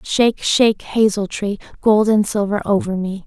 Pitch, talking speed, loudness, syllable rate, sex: 205 Hz, 165 wpm, -17 LUFS, 4.8 syllables/s, female